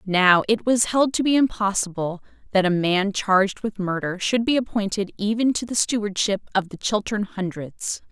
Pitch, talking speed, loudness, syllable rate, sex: 205 Hz, 180 wpm, -22 LUFS, 4.9 syllables/s, female